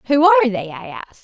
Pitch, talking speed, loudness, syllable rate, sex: 210 Hz, 245 wpm, -15 LUFS, 8.3 syllables/s, female